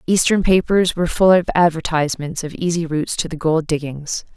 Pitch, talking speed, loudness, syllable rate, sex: 165 Hz, 180 wpm, -18 LUFS, 5.6 syllables/s, female